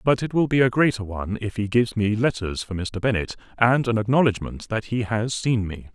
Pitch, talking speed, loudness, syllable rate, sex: 110 Hz, 230 wpm, -23 LUFS, 5.6 syllables/s, male